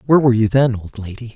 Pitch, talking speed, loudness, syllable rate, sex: 120 Hz, 265 wpm, -16 LUFS, 7.6 syllables/s, male